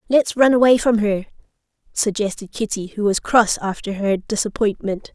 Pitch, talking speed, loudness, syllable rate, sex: 215 Hz, 150 wpm, -19 LUFS, 4.9 syllables/s, female